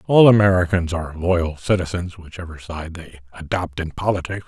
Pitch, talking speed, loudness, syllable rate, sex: 90 Hz, 145 wpm, -20 LUFS, 5.5 syllables/s, male